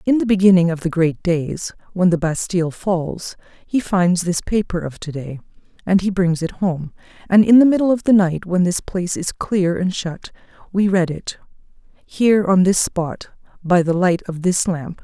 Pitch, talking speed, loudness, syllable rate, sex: 180 Hz, 200 wpm, -18 LUFS, 4.7 syllables/s, female